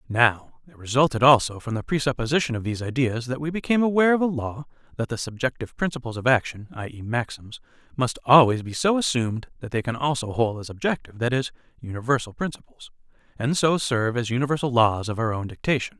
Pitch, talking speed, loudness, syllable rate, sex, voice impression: 125 Hz, 195 wpm, -23 LUFS, 6.4 syllables/s, male, masculine, middle-aged, tensed, slightly powerful, bright, clear, fluent, cool, intellectual, calm, friendly, slightly reassuring, wild, slightly strict